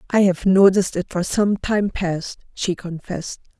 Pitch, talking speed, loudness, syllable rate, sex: 185 Hz, 165 wpm, -20 LUFS, 4.6 syllables/s, female